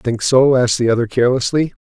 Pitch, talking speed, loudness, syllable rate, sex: 125 Hz, 195 wpm, -15 LUFS, 6.4 syllables/s, male